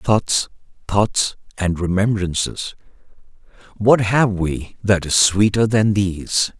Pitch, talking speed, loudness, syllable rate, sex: 100 Hz, 110 wpm, -18 LUFS, 3.5 syllables/s, male